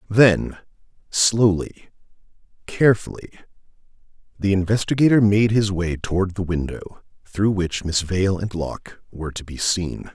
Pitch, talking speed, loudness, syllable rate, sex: 95 Hz, 125 wpm, -20 LUFS, 4.6 syllables/s, male